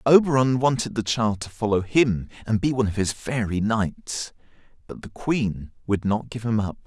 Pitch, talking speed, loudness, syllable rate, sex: 115 Hz, 190 wpm, -23 LUFS, 4.8 syllables/s, male